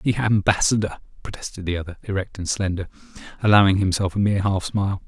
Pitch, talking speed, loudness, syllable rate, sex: 95 Hz, 165 wpm, -22 LUFS, 6.4 syllables/s, male